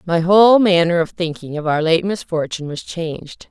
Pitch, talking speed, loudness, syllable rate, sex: 170 Hz, 190 wpm, -17 LUFS, 5.3 syllables/s, female